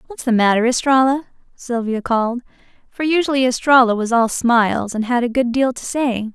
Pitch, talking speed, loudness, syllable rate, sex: 245 Hz, 180 wpm, -17 LUFS, 5.5 syllables/s, female